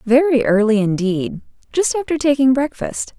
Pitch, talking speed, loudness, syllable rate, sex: 250 Hz, 115 wpm, -17 LUFS, 4.7 syllables/s, female